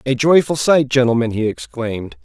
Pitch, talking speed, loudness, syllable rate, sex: 130 Hz, 160 wpm, -16 LUFS, 5.3 syllables/s, male